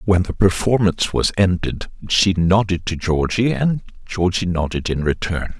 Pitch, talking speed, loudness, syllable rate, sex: 95 Hz, 150 wpm, -19 LUFS, 4.6 syllables/s, male